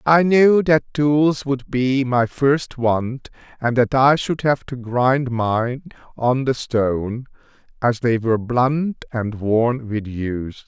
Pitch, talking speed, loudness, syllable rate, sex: 125 Hz, 155 wpm, -19 LUFS, 3.4 syllables/s, male